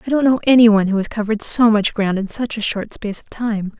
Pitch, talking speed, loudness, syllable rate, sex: 220 Hz, 285 wpm, -17 LUFS, 6.4 syllables/s, female